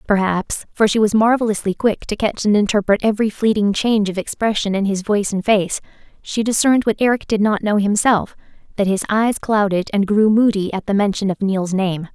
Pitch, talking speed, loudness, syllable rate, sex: 205 Hz, 190 wpm, -17 LUFS, 5.5 syllables/s, female